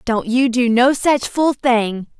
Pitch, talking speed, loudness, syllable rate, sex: 245 Hz, 190 wpm, -16 LUFS, 3.5 syllables/s, female